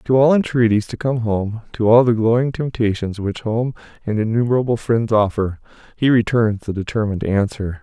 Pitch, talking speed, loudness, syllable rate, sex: 115 Hz, 170 wpm, -18 LUFS, 5.3 syllables/s, male